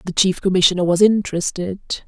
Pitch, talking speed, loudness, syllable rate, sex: 185 Hz, 145 wpm, -17 LUFS, 6.6 syllables/s, female